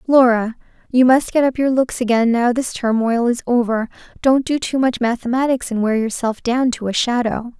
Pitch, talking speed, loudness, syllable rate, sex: 245 Hz, 195 wpm, -17 LUFS, 5.1 syllables/s, female